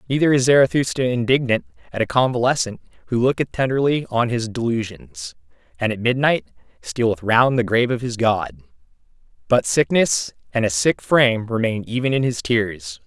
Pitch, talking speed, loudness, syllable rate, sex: 115 Hz, 155 wpm, -19 LUFS, 5.3 syllables/s, male